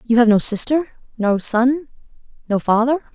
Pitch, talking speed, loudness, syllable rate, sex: 245 Hz, 115 wpm, -17 LUFS, 4.7 syllables/s, female